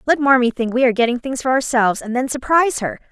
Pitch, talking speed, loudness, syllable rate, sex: 255 Hz, 250 wpm, -17 LUFS, 6.9 syllables/s, female